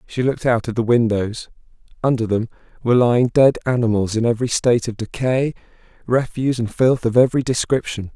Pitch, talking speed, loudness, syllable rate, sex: 120 Hz, 170 wpm, -19 LUFS, 6.1 syllables/s, male